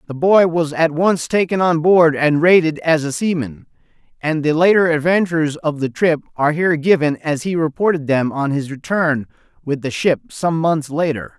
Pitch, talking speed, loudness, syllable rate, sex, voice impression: 160 Hz, 190 wpm, -17 LUFS, 5.0 syllables/s, male, masculine, adult-like, clear, refreshing, slightly friendly, slightly unique